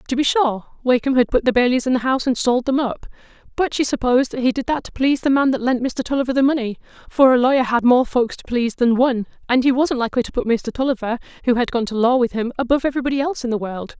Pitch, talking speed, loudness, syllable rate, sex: 250 Hz, 265 wpm, -19 LUFS, 7.0 syllables/s, female